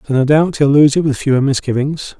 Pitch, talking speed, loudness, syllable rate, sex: 140 Hz, 245 wpm, -14 LUFS, 5.9 syllables/s, male